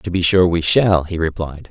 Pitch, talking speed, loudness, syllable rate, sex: 85 Hz, 245 wpm, -16 LUFS, 4.8 syllables/s, male